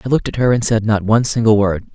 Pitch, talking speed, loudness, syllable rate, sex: 110 Hz, 310 wpm, -15 LUFS, 7.3 syllables/s, male